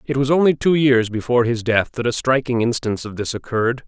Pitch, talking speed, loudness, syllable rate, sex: 125 Hz, 230 wpm, -19 LUFS, 6.2 syllables/s, male